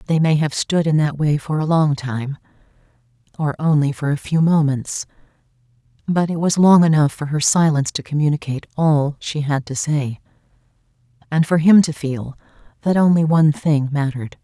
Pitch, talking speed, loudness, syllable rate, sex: 145 Hz, 175 wpm, -18 LUFS, 5.2 syllables/s, female